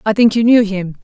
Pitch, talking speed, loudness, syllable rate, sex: 210 Hz, 290 wpm, -13 LUFS, 5.8 syllables/s, female